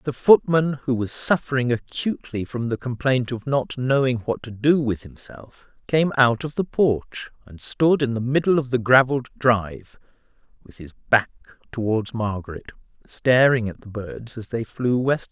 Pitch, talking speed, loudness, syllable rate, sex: 125 Hz, 170 wpm, -21 LUFS, 4.7 syllables/s, male